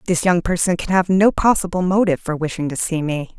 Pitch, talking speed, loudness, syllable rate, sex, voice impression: 175 Hz, 230 wpm, -18 LUFS, 6.1 syllables/s, female, very feminine, adult-like, thin, tensed, powerful, bright, slightly soft, clear, fluent, slightly raspy, cool, very intellectual, refreshing, sincere, slightly calm, friendly, very reassuring, unique, slightly elegant, slightly wild, sweet, lively, kind, slightly intense, slightly modest, slightly light